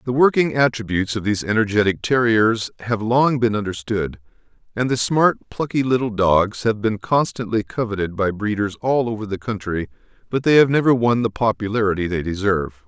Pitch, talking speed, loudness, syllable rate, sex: 110 Hz, 170 wpm, -20 LUFS, 5.4 syllables/s, male